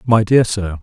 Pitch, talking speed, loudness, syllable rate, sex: 105 Hz, 220 wpm, -14 LUFS, 4.2 syllables/s, male